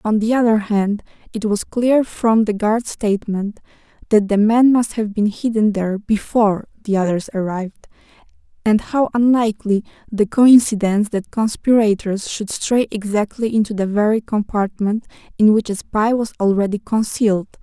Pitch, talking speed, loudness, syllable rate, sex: 215 Hz, 150 wpm, -18 LUFS, 4.9 syllables/s, female